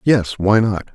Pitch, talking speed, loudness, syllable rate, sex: 105 Hz, 190 wpm, -17 LUFS, 3.6 syllables/s, male